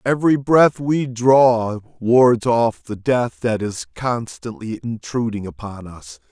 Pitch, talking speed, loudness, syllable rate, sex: 120 Hz, 135 wpm, -18 LUFS, 3.6 syllables/s, male